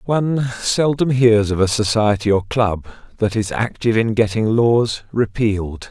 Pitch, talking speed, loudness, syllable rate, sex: 110 Hz, 150 wpm, -18 LUFS, 4.4 syllables/s, male